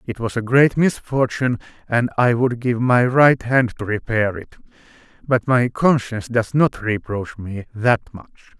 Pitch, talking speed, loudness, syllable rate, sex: 120 Hz, 160 wpm, -19 LUFS, 4.3 syllables/s, male